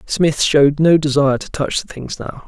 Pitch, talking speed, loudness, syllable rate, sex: 145 Hz, 220 wpm, -16 LUFS, 5.2 syllables/s, male